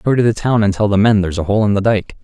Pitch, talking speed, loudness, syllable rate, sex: 105 Hz, 375 wpm, -15 LUFS, 6.9 syllables/s, male